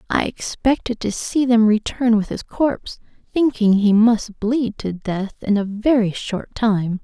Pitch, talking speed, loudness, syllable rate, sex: 220 Hz, 170 wpm, -19 LUFS, 4.0 syllables/s, female